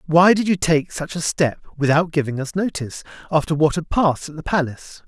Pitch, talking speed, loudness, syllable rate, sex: 160 Hz, 215 wpm, -20 LUFS, 5.8 syllables/s, male